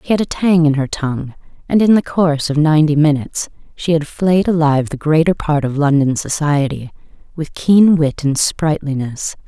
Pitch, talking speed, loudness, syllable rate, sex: 155 Hz, 185 wpm, -15 LUFS, 5.2 syllables/s, female